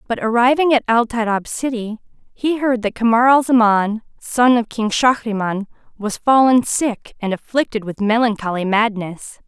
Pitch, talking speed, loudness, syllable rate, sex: 230 Hz, 150 wpm, -17 LUFS, 4.7 syllables/s, female